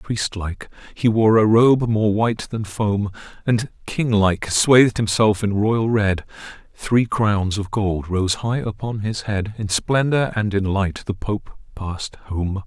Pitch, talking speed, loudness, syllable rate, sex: 105 Hz, 170 wpm, -20 LUFS, 3.8 syllables/s, male